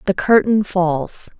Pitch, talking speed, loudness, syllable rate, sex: 190 Hz, 130 wpm, -17 LUFS, 3.4 syllables/s, female